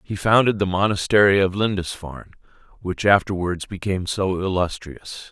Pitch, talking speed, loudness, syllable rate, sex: 95 Hz, 125 wpm, -20 LUFS, 5.1 syllables/s, male